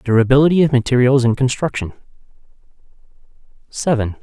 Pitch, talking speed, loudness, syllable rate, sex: 125 Hz, 85 wpm, -15 LUFS, 6.4 syllables/s, male